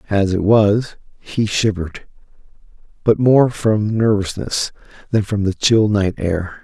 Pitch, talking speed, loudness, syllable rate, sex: 105 Hz, 135 wpm, -17 LUFS, 4.0 syllables/s, male